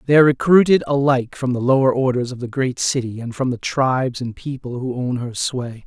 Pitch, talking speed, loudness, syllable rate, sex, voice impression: 130 Hz, 225 wpm, -19 LUFS, 5.6 syllables/s, male, masculine, adult-like, tensed, powerful, bright, slightly muffled, cool, calm, friendly, slightly reassuring, slightly wild, lively, kind, slightly modest